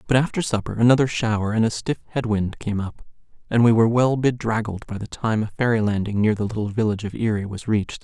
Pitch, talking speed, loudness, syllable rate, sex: 110 Hz, 230 wpm, -22 LUFS, 6.3 syllables/s, male